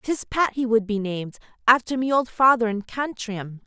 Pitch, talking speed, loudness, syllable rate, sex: 235 Hz, 195 wpm, -22 LUFS, 5.0 syllables/s, female